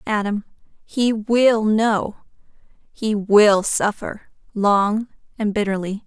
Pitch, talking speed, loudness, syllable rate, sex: 210 Hz, 90 wpm, -19 LUFS, 3.2 syllables/s, female